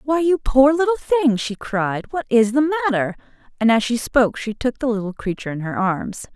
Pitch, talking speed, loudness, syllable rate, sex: 245 Hz, 215 wpm, -19 LUFS, 5.4 syllables/s, female